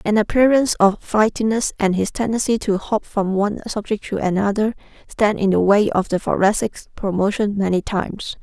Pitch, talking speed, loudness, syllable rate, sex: 205 Hz, 170 wpm, -19 LUFS, 5.2 syllables/s, female